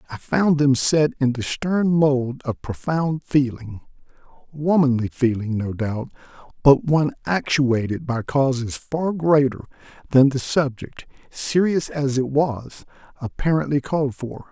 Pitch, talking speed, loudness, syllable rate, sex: 135 Hz, 130 wpm, -21 LUFS, 4.2 syllables/s, male